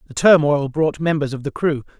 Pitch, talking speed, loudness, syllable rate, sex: 150 Hz, 210 wpm, -18 LUFS, 5.3 syllables/s, male